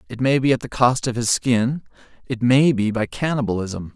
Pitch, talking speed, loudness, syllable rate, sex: 120 Hz, 210 wpm, -20 LUFS, 5.1 syllables/s, male